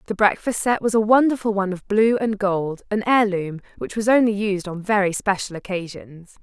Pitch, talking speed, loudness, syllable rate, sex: 205 Hz, 195 wpm, -20 LUFS, 5.2 syllables/s, female